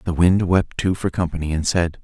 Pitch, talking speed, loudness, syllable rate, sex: 90 Hz, 235 wpm, -20 LUFS, 5.3 syllables/s, male